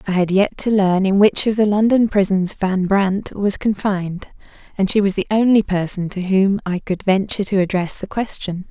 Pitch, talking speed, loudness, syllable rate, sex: 195 Hz, 205 wpm, -18 LUFS, 5.0 syllables/s, female